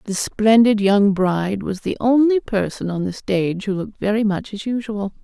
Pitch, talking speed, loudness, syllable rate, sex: 210 Hz, 195 wpm, -19 LUFS, 5.0 syllables/s, female